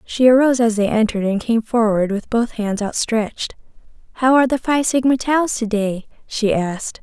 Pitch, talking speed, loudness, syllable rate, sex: 230 Hz, 190 wpm, -18 LUFS, 5.3 syllables/s, female